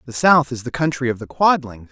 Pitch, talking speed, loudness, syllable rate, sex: 135 Hz, 250 wpm, -18 LUFS, 5.7 syllables/s, male